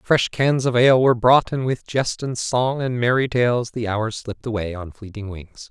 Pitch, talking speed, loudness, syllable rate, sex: 120 Hz, 220 wpm, -20 LUFS, 4.8 syllables/s, male